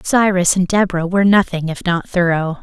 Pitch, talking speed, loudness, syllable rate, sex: 180 Hz, 185 wpm, -16 LUFS, 5.6 syllables/s, female